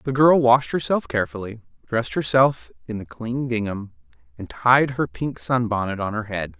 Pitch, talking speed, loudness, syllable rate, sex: 115 Hz, 175 wpm, -21 LUFS, 4.9 syllables/s, male